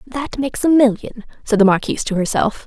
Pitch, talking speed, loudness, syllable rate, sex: 240 Hz, 200 wpm, -17 LUFS, 5.9 syllables/s, female